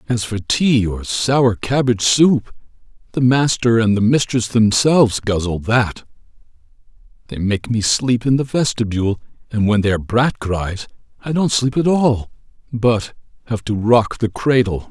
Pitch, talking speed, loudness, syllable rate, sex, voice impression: 115 Hz, 155 wpm, -17 LUFS, 4.3 syllables/s, male, masculine, middle-aged, thick, tensed, powerful, slightly hard, clear, raspy, mature, reassuring, wild, lively, slightly strict